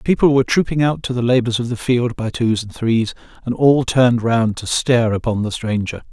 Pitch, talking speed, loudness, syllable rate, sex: 120 Hz, 225 wpm, -17 LUFS, 5.4 syllables/s, male